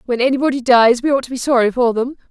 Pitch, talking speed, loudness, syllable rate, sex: 250 Hz, 260 wpm, -15 LUFS, 6.8 syllables/s, female